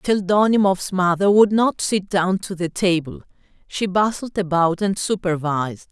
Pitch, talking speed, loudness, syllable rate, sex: 185 Hz, 140 wpm, -19 LUFS, 4.5 syllables/s, female